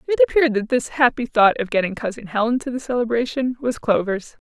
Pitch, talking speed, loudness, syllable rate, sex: 240 Hz, 200 wpm, -20 LUFS, 6.2 syllables/s, female